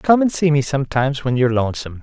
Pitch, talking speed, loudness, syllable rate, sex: 140 Hz, 240 wpm, -18 LUFS, 7.5 syllables/s, male